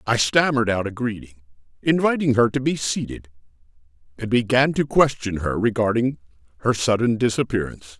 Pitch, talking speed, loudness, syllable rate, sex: 115 Hz, 145 wpm, -21 LUFS, 5.6 syllables/s, male